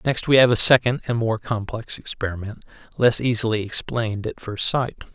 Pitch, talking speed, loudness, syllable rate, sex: 115 Hz, 175 wpm, -21 LUFS, 5.3 syllables/s, male